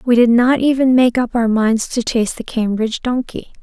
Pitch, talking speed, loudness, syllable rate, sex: 240 Hz, 215 wpm, -15 LUFS, 5.3 syllables/s, female